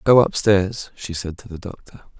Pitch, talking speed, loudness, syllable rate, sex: 95 Hz, 190 wpm, -20 LUFS, 4.7 syllables/s, male